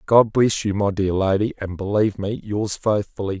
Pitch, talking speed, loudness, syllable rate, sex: 100 Hz, 195 wpm, -21 LUFS, 5.0 syllables/s, male